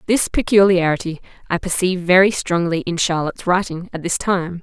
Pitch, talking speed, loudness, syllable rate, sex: 180 Hz, 155 wpm, -18 LUFS, 5.5 syllables/s, female